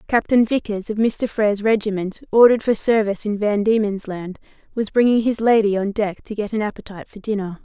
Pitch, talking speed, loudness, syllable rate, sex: 210 Hz, 195 wpm, -19 LUFS, 5.8 syllables/s, female